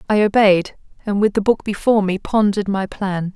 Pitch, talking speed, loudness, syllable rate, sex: 200 Hz, 195 wpm, -17 LUFS, 5.5 syllables/s, female